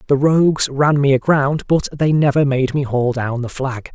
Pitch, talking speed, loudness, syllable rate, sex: 140 Hz, 215 wpm, -16 LUFS, 4.7 syllables/s, male